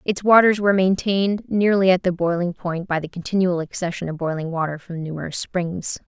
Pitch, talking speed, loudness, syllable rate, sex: 180 Hz, 185 wpm, -21 LUFS, 5.6 syllables/s, female